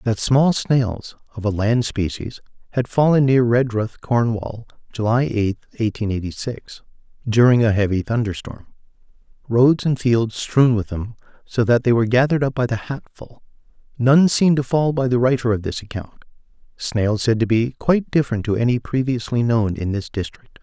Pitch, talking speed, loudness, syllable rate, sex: 115 Hz, 170 wpm, -19 LUFS, 4.9 syllables/s, male